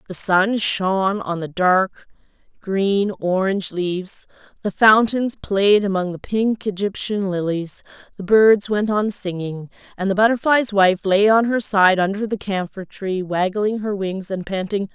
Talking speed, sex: 175 wpm, female